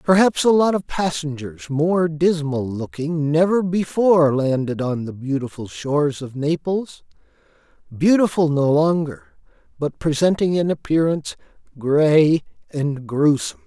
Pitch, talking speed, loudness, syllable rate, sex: 155 Hz, 115 wpm, -19 LUFS, 4.4 syllables/s, male